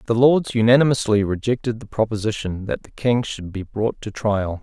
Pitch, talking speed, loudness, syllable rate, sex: 110 Hz, 180 wpm, -20 LUFS, 5.0 syllables/s, male